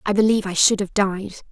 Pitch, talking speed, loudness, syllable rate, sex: 200 Hz, 240 wpm, -19 LUFS, 6.3 syllables/s, female